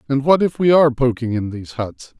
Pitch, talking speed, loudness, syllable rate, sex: 130 Hz, 245 wpm, -17 LUFS, 6.0 syllables/s, male